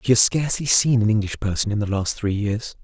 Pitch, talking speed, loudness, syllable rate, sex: 110 Hz, 255 wpm, -20 LUFS, 6.0 syllables/s, male